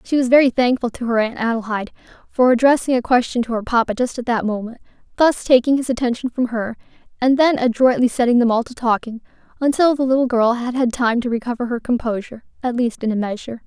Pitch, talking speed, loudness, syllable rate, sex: 240 Hz, 215 wpm, -18 LUFS, 6.3 syllables/s, female